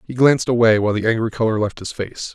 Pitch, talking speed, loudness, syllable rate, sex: 115 Hz, 255 wpm, -18 LUFS, 6.7 syllables/s, male